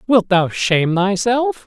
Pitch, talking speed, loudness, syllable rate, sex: 190 Hz, 145 wpm, -16 LUFS, 4.0 syllables/s, male